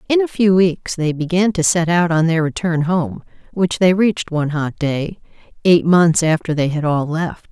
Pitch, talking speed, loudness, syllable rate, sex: 170 Hz, 210 wpm, -17 LUFS, 4.7 syllables/s, female